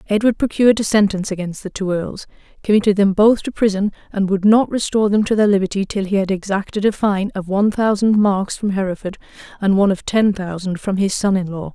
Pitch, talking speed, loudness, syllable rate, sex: 200 Hz, 220 wpm, -17 LUFS, 6.0 syllables/s, female